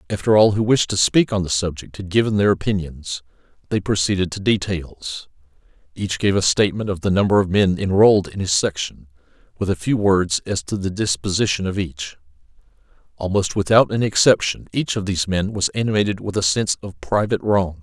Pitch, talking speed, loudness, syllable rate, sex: 95 Hz, 190 wpm, -19 LUFS, 5.7 syllables/s, male